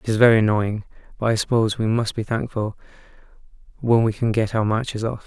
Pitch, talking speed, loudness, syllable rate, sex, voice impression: 110 Hz, 205 wpm, -21 LUFS, 6.3 syllables/s, male, very masculine, slightly adult-like, thick, slightly relaxed, weak, dark, soft, slightly muffled, fluent, slightly raspy, cool, very intellectual, slightly refreshing, sincere, very calm, friendly, very reassuring, slightly unique, elegant, slightly wild, sweet, lively, kind, slightly intense, slightly modest